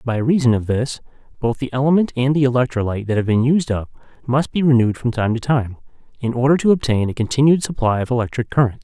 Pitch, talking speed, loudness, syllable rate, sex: 125 Hz, 215 wpm, -18 LUFS, 6.5 syllables/s, male